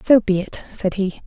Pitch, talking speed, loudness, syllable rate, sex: 200 Hz, 240 wpm, -20 LUFS, 4.8 syllables/s, female